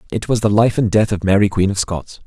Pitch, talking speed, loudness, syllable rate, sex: 105 Hz, 290 wpm, -16 LUFS, 6.1 syllables/s, male